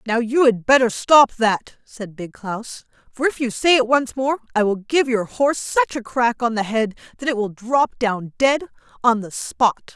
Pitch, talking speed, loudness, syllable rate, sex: 240 Hz, 215 wpm, -19 LUFS, 4.4 syllables/s, female